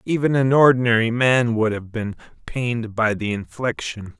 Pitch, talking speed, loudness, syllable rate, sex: 120 Hz, 155 wpm, -20 LUFS, 4.8 syllables/s, male